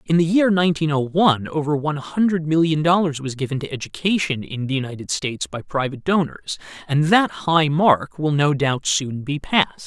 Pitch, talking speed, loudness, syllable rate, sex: 150 Hz, 195 wpm, -20 LUFS, 5.4 syllables/s, male